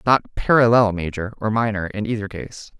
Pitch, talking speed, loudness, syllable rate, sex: 105 Hz, 170 wpm, -20 LUFS, 5.4 syllables/s, male